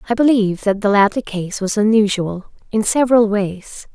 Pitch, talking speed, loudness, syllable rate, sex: 210 Hz, 165 wpm, -16 LUFS, 5.1 syllables/s, female